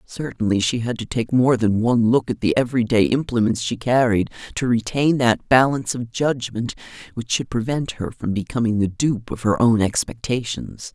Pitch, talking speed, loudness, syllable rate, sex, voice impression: 120 Hz, 185 wpm, -20 LUFS, 5.1 syllables/s, female, feminine, middle-aged, tensed, slightly powerful, hard, clear, fluent, intellectual, calm, elegant, lively, slightly strict, slightly sharp